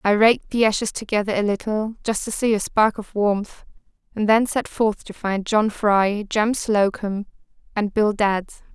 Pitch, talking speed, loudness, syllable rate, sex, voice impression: 210 Hz, 185 wpm, -21 LUFS, 4.5 syllables/s, female, feminine, adult-like, tensed, slightly powerful, slightly dark, slightly hard, clear, calm, elegant, sharp